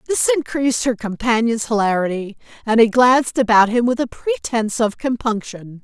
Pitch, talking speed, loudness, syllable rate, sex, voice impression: 235 Hz, 155 wpm, -18 LUFS, 5.3 syllables/s, female, feminine, gender-neutral, middle-aged, thin, tensed, very powerful, slightly dark, hard, slightly muffled, fluent, slightly raspy, cool, slightly intellectual, slightly refreshing, slightly sincere, slightly calm, slightly friendly, slightly reassuring, very unique, very wild, slightly sweet, very lively, very strict, intense, very sharp